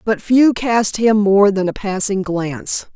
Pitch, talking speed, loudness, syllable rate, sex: 205 Hz, 185 wpm, -16 LUFS, 3.9 syllables/s, female